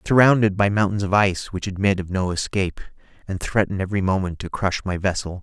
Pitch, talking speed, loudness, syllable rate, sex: 95 Hz, 220 wpm, -21 LUFS, 6.4 syllables/s, male